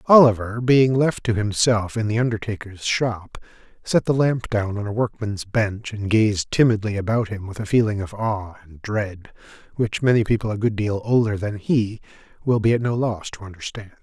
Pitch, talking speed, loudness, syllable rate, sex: 110 Hz, 190 wpm, -21 LUFS, 4.9 syllables/s, male